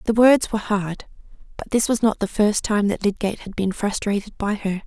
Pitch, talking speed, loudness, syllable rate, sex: 210 Hz, 220 wpm, -21 LUFS, 5.5 syllables/s, female